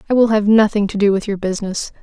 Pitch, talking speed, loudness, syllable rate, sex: 205 Hz, 265 wpm, -16 LUFS, 6.8 syllables/s, female